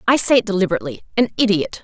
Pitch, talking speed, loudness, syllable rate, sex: 195 Hz, 165 wpm, -18 LUFS, 8.0 syllables/s, female